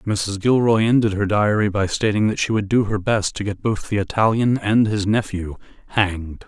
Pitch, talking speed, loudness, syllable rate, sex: 105 Hz, 205 wpm, -19 LUFS, 4.9 syllables/s, male